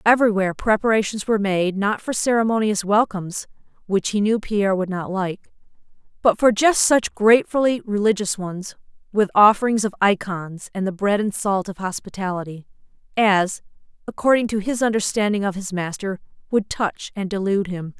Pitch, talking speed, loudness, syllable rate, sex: 205 Hz, 155 wpm, -20 LUFS, 5.0 syllables/s, female